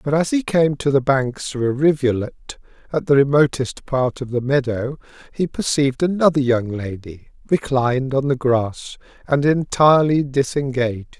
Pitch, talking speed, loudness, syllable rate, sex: 135 Hz, 155 wpm, -19 LUFS, 4.5 syllables/s, male